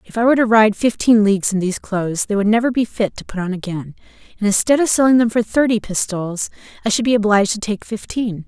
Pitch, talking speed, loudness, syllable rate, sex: 215 Hz, 240 wpm, -17 LUFS, 6.5 syllables/s, female